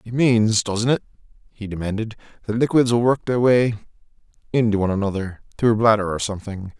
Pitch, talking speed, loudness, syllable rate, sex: 110 Hz, 170 wpm, -20 LUFS, 6.0 syllables/s, male